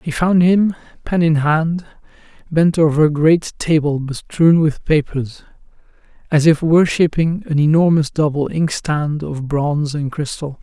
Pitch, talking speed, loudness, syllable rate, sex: 155 Hz, 140 wpm, -16 LUFS, 4.2 syllables/s, male